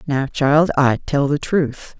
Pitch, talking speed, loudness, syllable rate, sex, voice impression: 145 Hz, 180 wpm, -18 LUFS, 3.4 syllables/s, female, very feminine, very middle-aged, slightly thin, tensed, powerful, bright, slightly soft, clear, fluent, slightly raspy, cool, intellectual, refreshing, very sincere, calm, mature, very friendly, very reassuring, unique, elegant, wild, sweet, very lively, kind, intense, slightly sharp